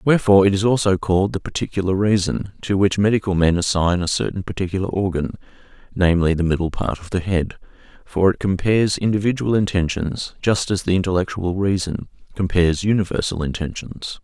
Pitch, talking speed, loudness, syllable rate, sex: 95 Hz, 155 wpm, -20 LUFS, 5.9 syllables/s, male